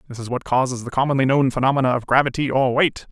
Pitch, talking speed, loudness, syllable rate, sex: 130 Hz, 230 wpm, -19 LUFS, 6.9 syllables/s, male